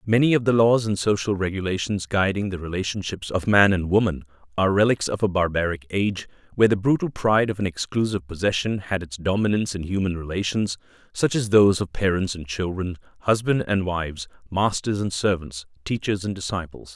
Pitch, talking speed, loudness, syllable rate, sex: 95 Hz, 175 wpm, -23 LUFS, 5.8 syllables/s, male